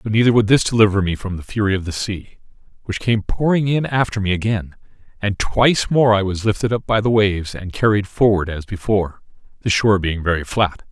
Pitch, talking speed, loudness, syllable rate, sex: 100 Hz, 215 wpm, -18 LUFS, 5.7 syllables/s, male